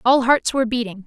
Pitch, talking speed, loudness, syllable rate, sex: 240 Hz, 225 wpm, -19 LUFS, 6.2 syllables/s, female